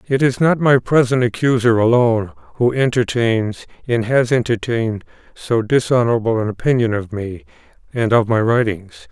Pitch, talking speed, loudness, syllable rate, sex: 120 Hz, 145 wpm, -17 LUFS, 5.0 syllables/s, male